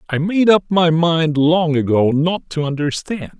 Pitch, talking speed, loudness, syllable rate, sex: 160 Hz, 175 wpm, -16 LUFS, 4.2 syllables/s, male